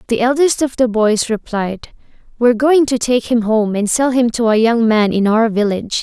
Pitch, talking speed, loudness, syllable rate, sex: 230 Hz, 220 wpm, -15 LUFS, 5.0 syllables/s, female